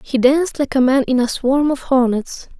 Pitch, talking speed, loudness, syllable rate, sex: 265 Hz, 230 wpm, -16 LUFS, 5.0 syllables/s, female